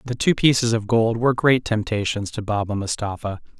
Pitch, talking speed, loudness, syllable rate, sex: 110 Hz, 185 wpm, -21 LUFS, 5.5 syllables/s, male